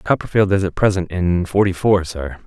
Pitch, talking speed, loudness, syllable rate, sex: 90 Hz, 195 wpm, -18 LUFS, 5.0 syllables/s, male